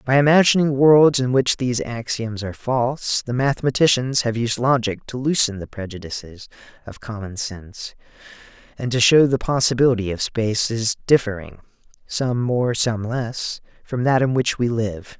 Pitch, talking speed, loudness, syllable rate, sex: 120 Hz, 145 wpm, -20 LUFS, 4.9 syllables/s, male